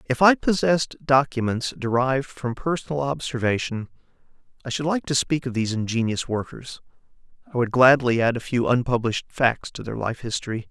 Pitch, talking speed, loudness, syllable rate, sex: 130 Hz, 160 wpm, -23 LUFS, 5.6 syllables/s, male